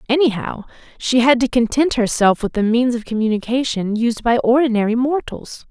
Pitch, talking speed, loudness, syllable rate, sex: 240 Hz, 160 wpm, -17 LUFS, 5.2 syllables/s, female